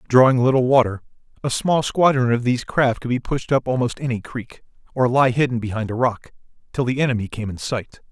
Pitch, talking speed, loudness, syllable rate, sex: 125 Hz, 205 wpm, -20 LUFS, 5.8 syllables/s, male